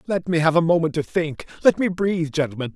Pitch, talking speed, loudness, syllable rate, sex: 165 Hz, 240 wpm, -21 LUFS, 6.3 syllables/s, male